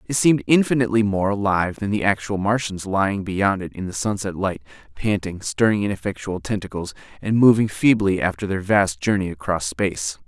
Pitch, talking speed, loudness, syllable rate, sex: 95 Hz, 170 wpm, -21 LUFS, 5.6 syllables/s, male